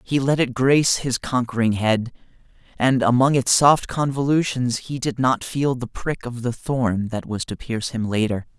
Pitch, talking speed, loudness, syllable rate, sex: 125 Hz, 190 wpm, -21 LUFS, 4.7 syllables/s, male